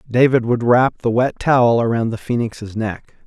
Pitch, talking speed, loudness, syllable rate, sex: 120 Hz, 185 wpm, -17 LUFS, 4.9 syllables/s, male